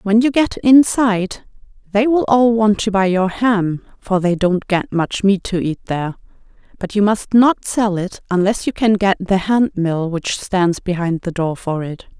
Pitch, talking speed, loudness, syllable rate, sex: 200 Hz, 200 wpm, -17 LUFS, 4.3 syllables/s, female